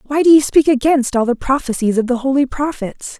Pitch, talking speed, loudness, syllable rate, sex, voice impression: 270 Hz, 225 wpm, -15 LUFS, 5.7 syllables/s, female, feminine, adult-like, tensed, powerful, bright, soft, slightly raspy, intellectual, calm, friendly, slightly reassuring, elegant, lively, kind